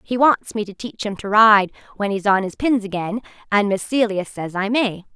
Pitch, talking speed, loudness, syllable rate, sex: 210 Hz, 235 wpm, -19 LUFS, 5.0 syllables/s, female